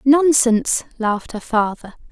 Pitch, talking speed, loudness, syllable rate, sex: 245 Hz, 115 wpm, -18 LUFS, 4.6 syllables/s, female